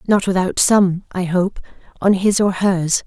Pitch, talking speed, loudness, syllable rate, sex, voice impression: 190 Hz, 175 wpm, -17 LUFS, 4.1 syllables/s, female, feminine, adult-like, slightly thick, tensed, slightly powerful, hard, slightly soft, slightly muffled, intellectual, calm, reassuring, elegant, kind, slightly modest